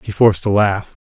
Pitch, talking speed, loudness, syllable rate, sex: 100 Hz, 230 wpm, -15 LUFS, 5.7 syllables/s, male